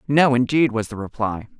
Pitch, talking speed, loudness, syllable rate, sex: 120 Hz, 190 wpm, -20 LUFS, 5.2 syllables/s, female